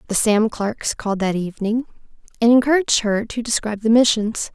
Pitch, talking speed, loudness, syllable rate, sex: 225 Hz, 170 wpm, -19 LUFS, 5.8 syllables/s, female